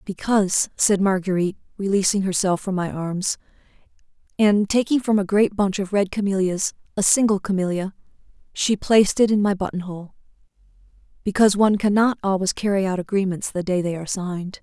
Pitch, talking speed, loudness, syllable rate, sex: 195 Hz, 160 wpm, -21 LUFS, 5.8 syllables/s, female